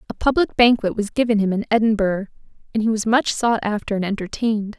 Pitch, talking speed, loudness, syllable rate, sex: 215 Hz, 200 wpm, -20 LUFS, 6.2 syllables/s, female